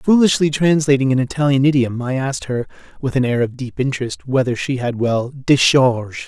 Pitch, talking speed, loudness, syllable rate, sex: 135 Hz, 180 wpm, -17 LUFS, 5.5 syllables/s, male